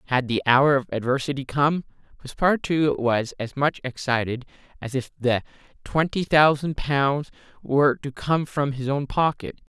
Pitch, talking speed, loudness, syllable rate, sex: 140 Hz, 145 wpm, -23 LUFS, 4.7 syllables/s, male